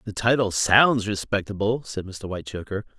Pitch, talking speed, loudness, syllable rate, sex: 105 Hz, 140 wpm, -23 LUFS, 5.1 syllables/s, male